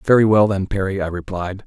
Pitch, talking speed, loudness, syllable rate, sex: 100 Hz, 215 wpm, -18 LUFS, 5.8 syllables/s, male